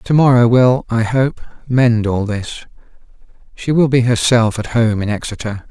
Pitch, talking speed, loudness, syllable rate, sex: 120 Hz, 170 wpm, -15 LUFS, 4.7 syllables/s, male